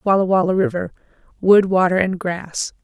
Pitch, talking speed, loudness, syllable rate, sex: 185 Hz, 125 wpm, -18 LUFS, 5.1 syllables/s, female